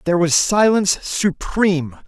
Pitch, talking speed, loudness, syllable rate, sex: 180 Hz, 115 wpm, -17 LUFS, 4.7 syllables/s, male